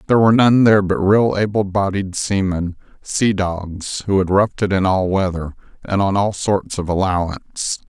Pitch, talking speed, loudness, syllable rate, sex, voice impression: 95 Hz, 175 wpm, -17 LUFS, 5.0 syllables/s, male, very masculine, very adult-like, very middle-aged, very thick, tensed, very powerful, slightly bright, slightly soft, muffled, fluent, slightly raspy, cool, very intellectual, sincere, very calm, very mature, very friendly, very reassuring, unique, slightly elegant, very wild, slightly sweet, slightly lively, kind, slightly modest